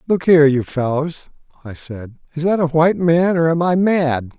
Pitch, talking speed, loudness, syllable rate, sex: 160 Hz, 205 wpm, -16 LUFS, 5.0 syllables/s, male